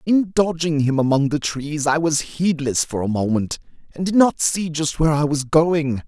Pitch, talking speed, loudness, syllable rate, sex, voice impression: 150 Hz, 210 wpm, -19 LUFS, 4.6 syllables/s, male, very masculine, very adult-like, middle-aged, very thick, slightly tensed, powerful, slightly dark, soft, clear, fluent, very cool, very intellectual, slightly refreshing, very sincere, very calm, very mature, very friendly, very reassuring, very unique, elegant, wild, sweet, slightly lively, very kind, slightly modest